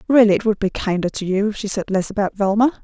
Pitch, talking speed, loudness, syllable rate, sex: 205 Hz, 275 wpm, -19 LUFS, 6.8 syllables/s, female